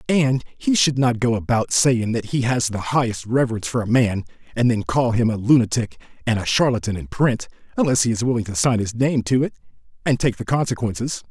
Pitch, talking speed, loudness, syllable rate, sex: 120 Hz, 220 wpm, -20 LUFS, 5.7 syllables/s, male